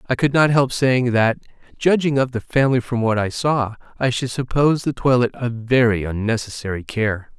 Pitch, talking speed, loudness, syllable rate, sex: 125 Hz, 185 wpm, -19 LUFS, 5.3 syllables/s, male